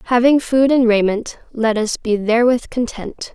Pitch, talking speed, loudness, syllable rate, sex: 235 Hz, 160 wpm, -16 LUFS, 4.8 syllables/s, female